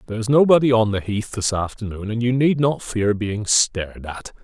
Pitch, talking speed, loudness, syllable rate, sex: 115 Hz, 215 wpm, -20 LUFS, 5.3 syllables/s, male